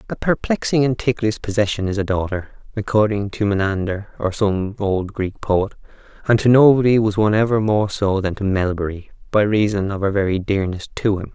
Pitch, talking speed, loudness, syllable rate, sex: 105 Hz, 185 wpm, -19 LUFS, 5.4 syllables/s, male